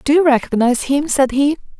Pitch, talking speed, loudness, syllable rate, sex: 275 Hz, 200 wpm, -15 LUFS, 6.0 syllables/s, female